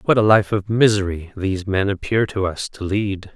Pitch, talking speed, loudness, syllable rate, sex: 100 Hz, 215 wpm, -19 LUFS, 4.9 syllables/s, male